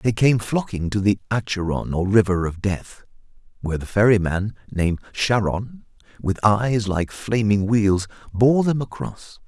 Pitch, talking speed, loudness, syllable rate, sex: 105 Hz, 145 wpm, -21 LUFS, 4.4 syllables/s, male